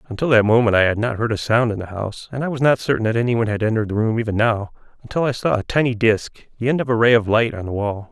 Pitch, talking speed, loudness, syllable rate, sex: 115 Hz, 305 wpm, -19 LUFS, 6.9 syllables/s, male